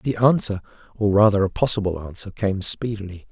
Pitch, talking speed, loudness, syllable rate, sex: 105 Hz, 165 wpm, -21 LUFS, 5.4 syllables/s, male